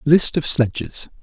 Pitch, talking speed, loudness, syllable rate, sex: 145 Hz, 145 wpm, -19 LUFS, 4.0 syllables/s, male